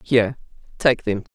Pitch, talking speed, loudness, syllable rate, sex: 175 Hz, 135 wpm, -21 LUFS, 5.1 syllables/s, female